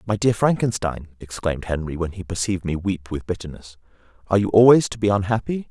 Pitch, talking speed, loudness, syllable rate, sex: 95 Hz, 190 wpm, -21 LUFS, 6.3 syllables/s, male